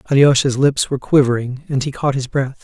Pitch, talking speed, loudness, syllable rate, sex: 135 Hz, 205 wpm, -17 LUFS, 6.0 syllables/s, male